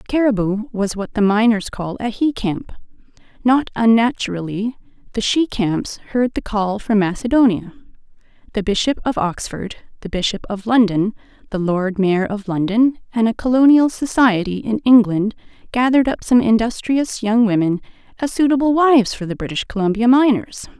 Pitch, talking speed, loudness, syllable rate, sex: 225 Hz, 150 wpm, -17 LUFS, 5.0 syllables/s, female